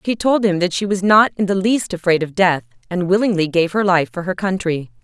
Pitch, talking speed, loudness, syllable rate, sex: 185 Hz, 250 wpm, -17 LUFS, 5.6 syllables/s, female